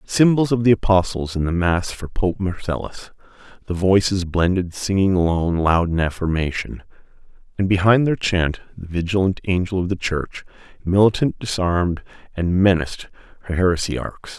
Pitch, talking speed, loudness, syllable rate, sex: 95 Hz, 140 wpm, -20 LUFS, 5.1 syllables/s, male